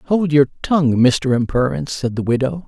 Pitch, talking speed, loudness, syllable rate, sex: 140 Hz, 180 wpm, -17 LUFS, 5.2 syllables/s, male